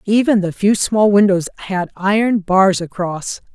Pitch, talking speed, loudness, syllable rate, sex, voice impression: 195 Hz, 150 wpm, -16 LUFS, 4.3 syllables/s, female, very feminine, very adult-like, slightly middle-aged, thin, slightly tensed, slightly powerful, slightly dark, hard, clear, fluent, cool, very intellectual, refreshing, sincere, slightly calm, friendly, reassuring, very unique, elegant, wild, sweet, lively, slightly strict, slightly intense